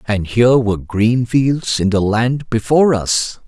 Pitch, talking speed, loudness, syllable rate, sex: 115 Hz, 175 wpm, -15 LUFS, 4.2 syllables/s, male